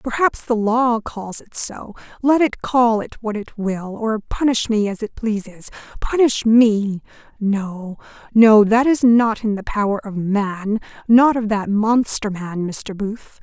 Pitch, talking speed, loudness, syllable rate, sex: 220 Hz, 145 wpm, -18 LUFS, 3.8 syllables/s, female